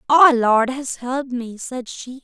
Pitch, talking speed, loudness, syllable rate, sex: 255 Hz, 190 wpm, -19 LUFS, 3.9 syllables/s, female